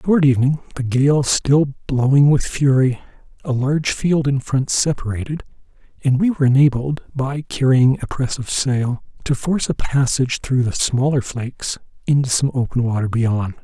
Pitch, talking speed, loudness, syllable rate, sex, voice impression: 135 Hz, 165 wpm, -18 LUFS, 4.9 syllables/s, male, masculine, old, relaxed, slightly weak, slightly halting, raspy, slightly sincere, calm, mature, slightly friendly, slightly wild, kind, slightly modest